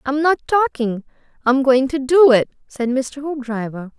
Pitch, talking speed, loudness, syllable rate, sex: 270 Hz, 165 wpm, -18 LUFS, 4.4 syllables/s, female